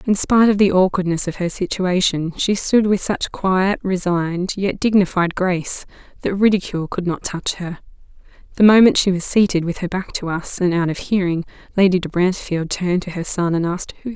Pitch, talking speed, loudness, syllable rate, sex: 185 Hz, 210 wpm, -18 LUFS, 5.6 syllables/s, female